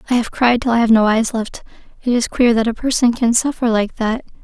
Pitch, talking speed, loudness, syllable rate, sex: 235 Hz, 255 wpm, -16 LUFS, 5.7 syllables/s, female